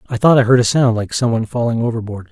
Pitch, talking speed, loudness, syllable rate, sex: 120 Hz, 285 wpm, -15 LUFS, 7.1 syllables/s, male